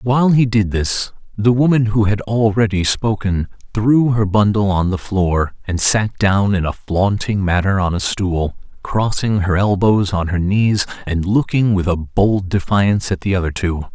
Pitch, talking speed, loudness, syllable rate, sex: 100 Hz, 180 wpm, -17 LUFS, 4.4 syllables/s, male